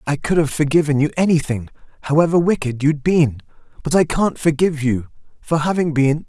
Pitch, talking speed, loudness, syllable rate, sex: 150 Hz, 160 wpm, -18 LUFS, 5.7 syllables/s, male